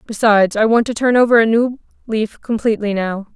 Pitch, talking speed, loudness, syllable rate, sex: 220 Hz, 195 wpm, -16 LUFS, 5.8 syllables/s, female